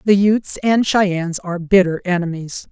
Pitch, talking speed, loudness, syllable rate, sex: 185 Hz, 155 wpm, -17 LUFS, 4.6 syllables/s, female